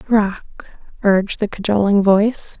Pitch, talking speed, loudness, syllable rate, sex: 205 Hz, 115 wpm, -17 LUFS, 4.9 syllables/s, female